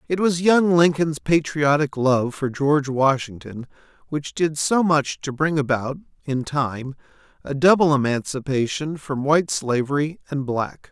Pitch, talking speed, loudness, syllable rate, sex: 145 Hz, 145 wpm, -21 LUFS, 4.3 syllables/s, male